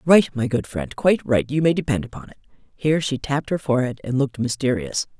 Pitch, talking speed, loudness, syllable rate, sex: 135 Hz, 220 wpm, -22 LUFS, 6.4 syllables/s, female